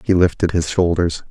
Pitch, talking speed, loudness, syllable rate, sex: 85 Hz, 185 wpm, -18 LUFS, 5.2 syllables/s, male